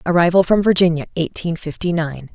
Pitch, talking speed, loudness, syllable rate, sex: 170 Hz, 155 wpm, -17 LUFS, 5.7 syllables/s, female